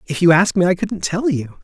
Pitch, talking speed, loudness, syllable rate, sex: 180 Hz, 295 wpm, -17 LUFS, 5.3 syllables/s, male